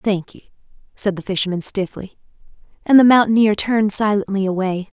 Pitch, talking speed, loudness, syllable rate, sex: 205 Hz, 145 wpm, -17 LUFS, 5.7 syllables/s, female